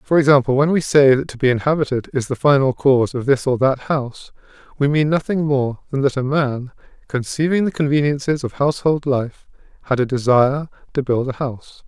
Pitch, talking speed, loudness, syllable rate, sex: 135 Hz, 195 wpm, -18 LUFS, 5.7 syllables/s, male